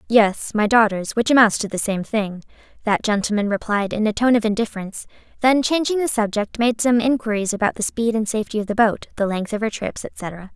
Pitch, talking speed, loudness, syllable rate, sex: 220 Hz, 215 wpm, -20 LUFS, 5.7 syllables/s, female